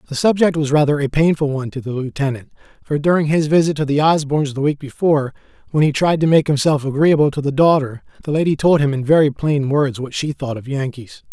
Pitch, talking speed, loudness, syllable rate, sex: 145 Hz, 230 wpm, -17 LUFS, 6.1 syllables/s, male